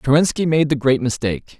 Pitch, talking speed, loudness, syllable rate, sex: 140 Hz, 190 wpm, -18 LUFS, 6.0 syllables/s, male